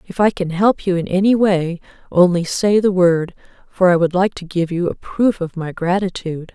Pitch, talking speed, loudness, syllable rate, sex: 180 Hz, 220 wpm, -17 LUFS, 5.0 syllables/s, female